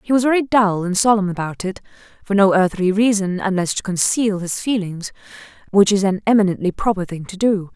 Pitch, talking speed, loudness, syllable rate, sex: 200 Hz, 180 wpm, -18 LUFS, 5.6 syllables/s, female